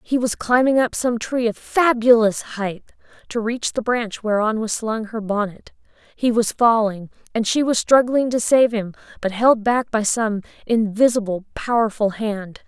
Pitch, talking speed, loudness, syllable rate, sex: 225 Hz, 170 wpm, -19 LUFS, 4.4 syllables/s, female